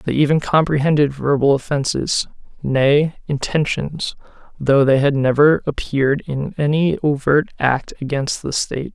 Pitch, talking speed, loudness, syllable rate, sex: 145 Hz, 125 wpm, -18 LUFS, 4.5 syllables/s, male